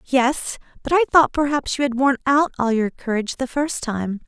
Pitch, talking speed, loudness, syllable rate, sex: 265 Hz, 210 wpm, -20 LUFS, 5.1 syllables/s, female